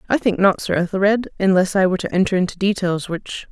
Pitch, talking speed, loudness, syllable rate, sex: 190 Hz, 220 wpm, -19 LUFS, 6.2 syllables/s, female